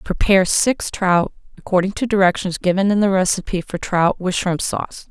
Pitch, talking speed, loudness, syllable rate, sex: 190 Hz, 175 wpm, -18 LUFS, 5.3 syllables/s, female